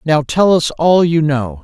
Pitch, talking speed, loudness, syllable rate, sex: 160 Hz, 220 wpm, -13 LUFS, 3.9 syllables/s, male